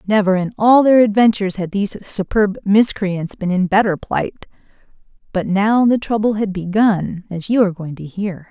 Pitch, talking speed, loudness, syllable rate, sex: 200 Hz, 175 wpm, -17 LUFS, 5.0 syllables/s, female